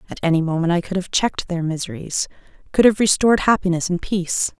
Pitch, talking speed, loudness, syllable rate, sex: 180 Hz, 195 wpm, -19 LUFS, 6.4 syllables/s, female